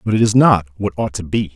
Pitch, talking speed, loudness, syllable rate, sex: 100 Hz, 310 wpm, -16 LUFS, 6.2 syllables/s, male